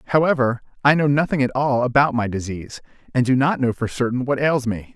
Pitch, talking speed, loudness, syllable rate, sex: 130 Hz, 220 wpm, -20 LUFS, 6.0 syllables/s, male